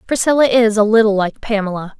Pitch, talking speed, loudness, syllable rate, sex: 220 Hz, 180 wpm, -14 LUFS, 6.0 syllables/s, female